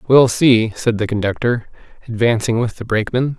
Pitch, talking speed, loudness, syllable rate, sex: 115 Hz, 160 wpm, -17 LUFS, 5.3 syllables/s, male